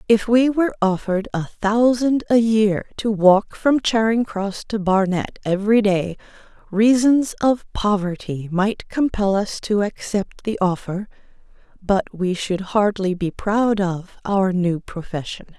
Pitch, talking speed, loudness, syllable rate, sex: 205 Hz, 140 wpm, -20 LUFS, 4.0 syllables/s, female